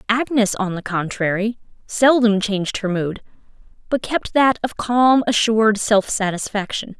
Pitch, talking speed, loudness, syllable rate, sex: 215 Hz, 135 wpm, -19 LUFS, 4.5 syllables/s, female